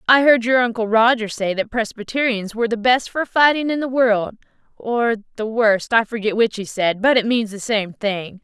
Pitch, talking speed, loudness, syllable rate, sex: 225 Hz, 205 wpm, -18 LUFS, 5.0 syllables/s, female